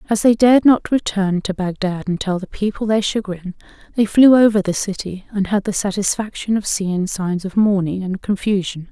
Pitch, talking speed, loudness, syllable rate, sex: 200 Hz, 195 wpm, -18 LUFS, 5.1 syllables/s, female